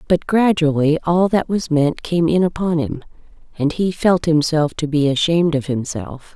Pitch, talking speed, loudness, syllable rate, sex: 160 Hz, 180 wpm, -18 LUFS, 4.7 syllables/s, female